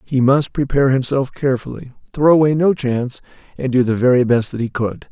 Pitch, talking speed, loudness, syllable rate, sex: 130 Hz, 200 wpm, -17 LUFS, 5.9 syllables/s, male